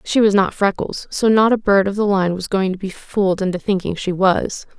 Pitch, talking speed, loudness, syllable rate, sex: 195 Hz, 250 wpm, -18 LUFS, 5.3 syllables/s, female